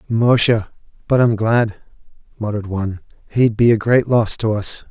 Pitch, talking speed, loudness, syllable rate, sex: 110 Hz, 185 wpm, -17 LUFS, 5.1 syllables/s, male